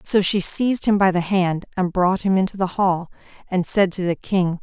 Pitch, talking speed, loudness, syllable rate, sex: 185 Hz, 235 wpm, -20 LUFS, 4.9 syllables/s, female